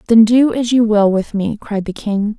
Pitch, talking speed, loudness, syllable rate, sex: 220 Hz, 250 wpm, -15 LUFS, 4.6 syllables/s, female